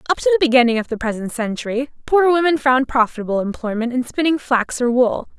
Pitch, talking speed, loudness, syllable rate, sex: 255 Hz, 200 wpm, -18 LUFS, 6.2 syllables/s, female